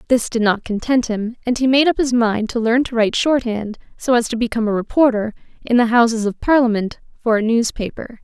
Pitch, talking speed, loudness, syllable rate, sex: 235 Hz, 220 wpm, -18 LUFS, 5.7 syllables/s, female